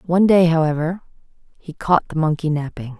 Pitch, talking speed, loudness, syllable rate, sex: 165 Hz, 160 wpm, -18 LUFS, 5.9 syllables/s, female